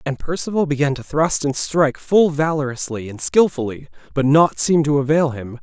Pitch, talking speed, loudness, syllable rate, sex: 145 Hz, 180 wpm, -18 LUFS, 5.3 syllables/s, male